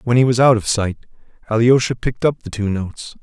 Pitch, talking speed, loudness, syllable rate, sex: 115 Hz, 225 wpm, -17 LUFS, 6.2 syllables/s, male